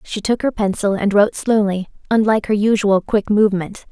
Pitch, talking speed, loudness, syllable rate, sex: 205 Hz, 185 wpm, -17 LUFS, 5.6 syllables/s, female